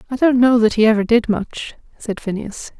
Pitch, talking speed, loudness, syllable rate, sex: 225 Hz, 215 wpm, -16 LUFS, 5.2 syllables/s, female